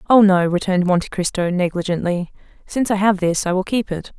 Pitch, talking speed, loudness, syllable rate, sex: 185 Hz, 200 wpm, -19 LUFS, 6.1 syllables/s, female